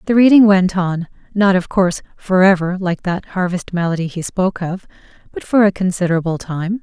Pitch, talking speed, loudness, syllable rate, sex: 185 Hz, 185 wpm, -16 LUFS, 5.4 syllables/s, female